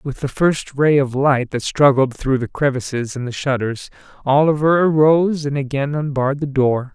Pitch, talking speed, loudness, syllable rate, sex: 140 Hz, 180 wpm, -18 LUFS, 4.9 syllables/s, male